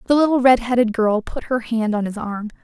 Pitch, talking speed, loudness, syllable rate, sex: 230 Hz, 250 wpm, -19 LUFS, 5.6 syllables/s, female